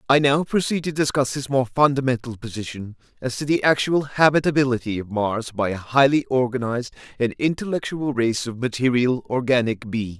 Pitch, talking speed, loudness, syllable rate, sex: 130 Hz, 160 wpm, -21 LUFS, 5.4 syllables/s, male